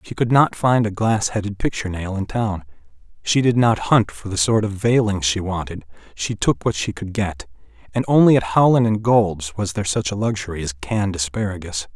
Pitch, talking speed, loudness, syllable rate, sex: 100 Hz, 205 wpm, -20 LUFS, 5.3 syllables/s, male